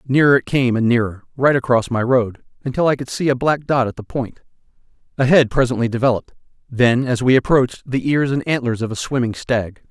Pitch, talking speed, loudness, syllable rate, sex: 125 Hz, 210 wpm, -18 LUFS, 5.7 syllables/s, male